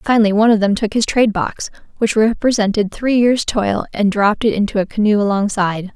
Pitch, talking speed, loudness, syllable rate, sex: 210 Hz, 200 wpm, -16 LUFS, 5.9 syllables/s, female